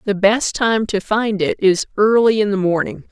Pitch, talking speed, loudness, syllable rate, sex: 205 Hz, 210 wpm, -16 LUFS, 4.6 syllables/s, female